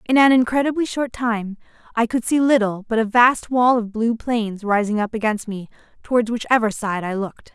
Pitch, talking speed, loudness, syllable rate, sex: 230 Hz, 200 wpm, -19 LUFS, 5.2 syllables/s, female